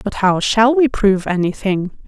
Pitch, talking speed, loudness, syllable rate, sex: 210 Hz, 175 wpm, -16 LUFS, 4.9 syllables/s, female